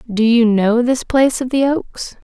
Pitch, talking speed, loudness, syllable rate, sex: 240 Hz, 205 wpm, -15 LUFS, 4.5 syllables/s, female